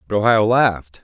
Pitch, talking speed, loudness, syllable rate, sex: 105 Hz, 175 wpm, -16 LUFS, 5.8 syllables/s, male